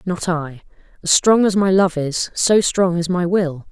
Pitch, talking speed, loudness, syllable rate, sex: 180 Hz, 210 wpm, -17 LUFS, 4.1 syllables/s, female